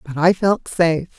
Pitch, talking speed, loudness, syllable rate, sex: 170 Hz, 200 wpm, -18 LUFS, 5.2 syllables/s, female